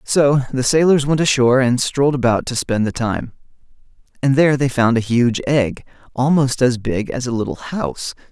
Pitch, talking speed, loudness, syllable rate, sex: 125 Hz, 190 wpm, -17 LUFS, 5.2 syllables/s, male